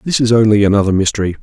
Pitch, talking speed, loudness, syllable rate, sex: 105 Hz, 210 wpm, -12 LUFS, 7.9 syllables/s, male